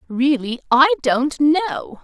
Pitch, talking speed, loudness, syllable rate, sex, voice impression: 285 Hz, 120 wpm, -17 LUFS, 3.0 syllables/s, female, very feminine, slightly powerful, slightly clear, intellectual, slightly strict